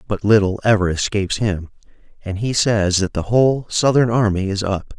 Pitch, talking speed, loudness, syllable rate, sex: 105 Hz, 180 wpm, -18 LUFS, 5.1 syllables/s, male